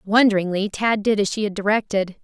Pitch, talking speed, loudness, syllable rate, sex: 205 Hz, 190 wpm, -20 LUFS, 5.7 syllables/s, female